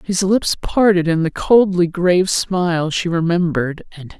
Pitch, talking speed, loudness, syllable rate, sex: 175 Hz, 170 wpm, -16 LUFS, 4.9 syllables/s, female